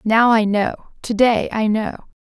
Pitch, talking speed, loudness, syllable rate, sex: 220 Hz, 160 wpm, -18 LUFS, 4.4 syllables/s, female